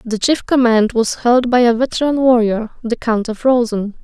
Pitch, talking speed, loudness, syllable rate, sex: 235 Hz, 195 wpm, -15 LUFS, 4.8 syllables/s, female